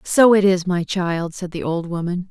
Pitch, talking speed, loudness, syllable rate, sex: 180 Hz, 235 wpm, -19 LUFS, 4.5 syllables/s, female